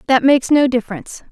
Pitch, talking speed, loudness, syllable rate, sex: 260 Hz, 185 wpm, -14 LUFS, 7.3 syllables/s, female